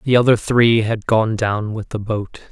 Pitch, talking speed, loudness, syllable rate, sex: 110 Hz, 215 wpm, -17 LUFS, 4.2 syllables/s, male